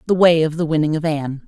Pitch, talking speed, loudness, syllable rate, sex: 160 Hz, 285 wpm, -17 LUFS, 7.1 syllables/s, female